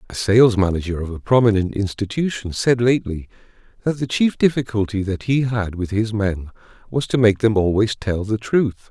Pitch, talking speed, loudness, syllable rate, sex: 110 Hz, 180 wpm, -19 LUFS, 5.2 syllables/s, male